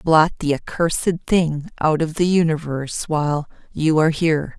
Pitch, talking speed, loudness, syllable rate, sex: 155 Hz, 145 wpm, -20 LUFS, 5.6 syllables/s, female